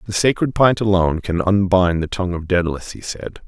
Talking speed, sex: 205 wpm, male